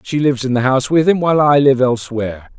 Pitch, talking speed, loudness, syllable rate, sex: 135 Hz, 255 wpm, -14 LUFS, 6.9 syllables/s, male